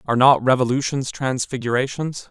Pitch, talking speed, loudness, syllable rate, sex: 130 Hz, 105 wpm, -20 LUFS, 5.5 syllables/s, male